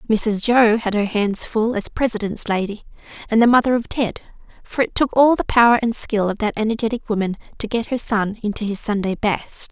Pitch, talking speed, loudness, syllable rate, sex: 220 Hz, 210 wpm, -19 LUFS, 5.4 syllables/s, female